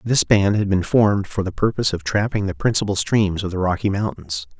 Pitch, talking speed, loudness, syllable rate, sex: 100 Hz, 220 wpm, -20 LUFS, 5.7 syllables/s, male